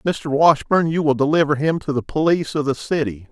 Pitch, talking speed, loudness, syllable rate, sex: 145 Hz, 215 wpm, -19 LUFS, 5.5 syllables/s, male